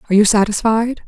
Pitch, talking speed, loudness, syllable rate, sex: 215 Hz, 165 wpm, -15 LUFS, 7.0 syllables/s, female